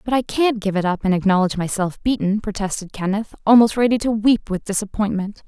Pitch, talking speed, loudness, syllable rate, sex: 210 Hz, 195 wpm, -19 LUFS, 5.9 syllables/s, female